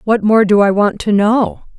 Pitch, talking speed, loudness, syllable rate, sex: 210 Hz, 235 wpm, -13 LUFS, 4.6 syllables/s, female